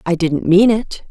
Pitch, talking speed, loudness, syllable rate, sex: 185 Hz, 220 wpm, -14 LUFS, 4.1 syllables/s, female